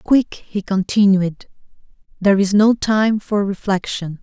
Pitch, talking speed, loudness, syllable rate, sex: 200 Hz, 130 wpm, -17 LUFS, 4.1 syllables/s, female